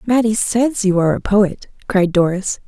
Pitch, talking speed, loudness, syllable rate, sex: 205 Hz, 180 wpm, -16 LUFS, 4.7 syllables/s, female